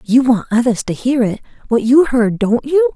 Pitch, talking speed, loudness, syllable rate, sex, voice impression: 240 Hz, 185 wpm, -15 LUFS, 4.8 syllables/s, female, feminine, adult-like, slightly muffled, intellectual, slightly calm, elegant